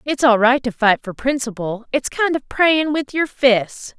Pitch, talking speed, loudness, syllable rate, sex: 255 Hz, 210 wpm, -18 LUFS, 4.2 syllables/s, female